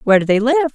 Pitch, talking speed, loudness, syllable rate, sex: 250 Hz, 325 wpm, -15 LUFS, 8.1 syllables/s, female